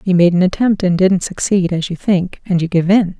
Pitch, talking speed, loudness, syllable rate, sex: 185 Hz, 265 wpm, -15 LUFS, 5.3 syllables/s, female